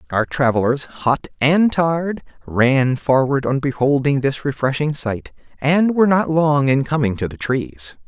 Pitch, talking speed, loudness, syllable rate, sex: 140 Hz, 155 wpm, -18 LUFS, 4.3 syllables/s, male